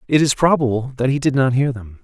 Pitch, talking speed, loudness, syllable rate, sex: 130 Hz, 265 wpm, -18 LUFS, 6.0 syllables/s, male